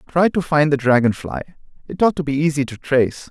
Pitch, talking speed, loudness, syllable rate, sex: 145 Hz, 220 wpm, -18 LUFS, 5.9 syllables/s, male